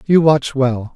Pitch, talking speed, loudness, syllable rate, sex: 140 Hz, 190 wpm, -15 LUFS, 3.5 syllables/s, male